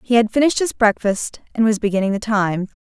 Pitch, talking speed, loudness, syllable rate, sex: 215 Hz, 210 wpm, -18 LUFS, 6.4 syllables/s, female